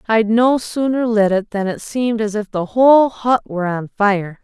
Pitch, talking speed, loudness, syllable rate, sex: 220 Hz, 215 wpm, -16 LUFS, 4.8 syllables/s, female